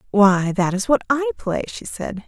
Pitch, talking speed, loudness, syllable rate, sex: 210 Hz, 210 wpm, -20 LUFS, 4.3 syllables/s, female